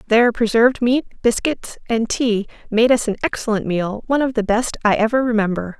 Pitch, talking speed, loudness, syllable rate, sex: 230 Hz, 185 wpm, -18 LUFS, 5.7 syllables/s, female